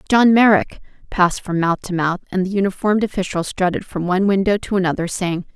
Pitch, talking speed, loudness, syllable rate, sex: 190 Hz, 205 wpm, -18 LUFS, 6.4 syllables/s, female